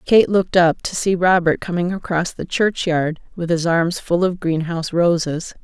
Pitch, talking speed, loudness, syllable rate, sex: 175 Hz, 180 wpm, -18 LUFS, 4.7 syllables/s, female